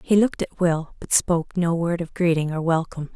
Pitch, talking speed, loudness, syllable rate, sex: 170 Hz, 230 wpm, -22 LUFS, 5.8 syllables/s, female